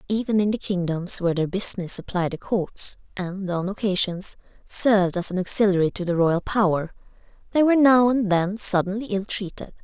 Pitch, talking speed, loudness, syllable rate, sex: 195 Hz, 175 wpm, -22 LUFS, 5.4 syllables/s, female